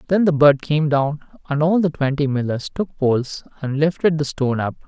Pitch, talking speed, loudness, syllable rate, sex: 145 Hz, 210 wpm, -19 LUFS, 5.2 syllables/s, male